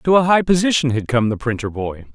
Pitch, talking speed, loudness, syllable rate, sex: 135 Hz, 250 wpm, -18 LUFS, 5.7 syllables/s, male